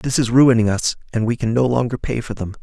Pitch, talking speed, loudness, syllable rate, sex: 120 Hz, 275 wpm, -18 LUFS, 5.9 syllables/s, male